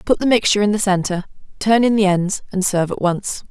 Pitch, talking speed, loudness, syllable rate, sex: 200 Hz, 240 wpm, -17 LUFS, 6.1 syllables/s, female